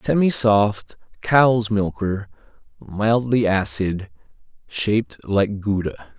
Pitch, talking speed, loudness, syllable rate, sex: 100 Hz, 80 wpm, -20 LUFS, 3.2 syllables/s, male